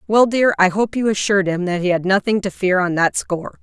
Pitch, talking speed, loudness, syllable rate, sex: 195 Hz, 265 wpm, -17 LUFS, 5.9 syllables/s, female